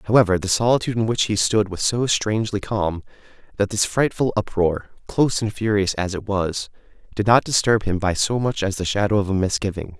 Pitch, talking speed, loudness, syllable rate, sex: 105 Hz, 205 wpm, -21 LUFS, 5.7 syllables/s, male